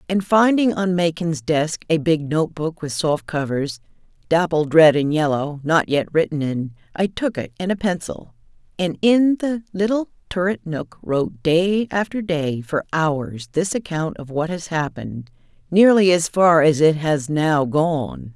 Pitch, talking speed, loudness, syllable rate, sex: 165 Hz, 170 wpm, -20 LUFS, 4.2 syllables/s, female